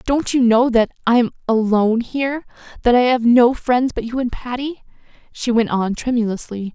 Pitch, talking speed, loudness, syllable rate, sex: 240 Hz, 180 wpm, -18 LUFS, 5.2 syllables/s, female